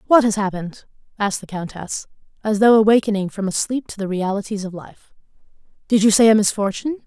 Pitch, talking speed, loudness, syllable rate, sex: 210 Hz, 185 wpm, -19 LUFS, 6.3 syllables/s, female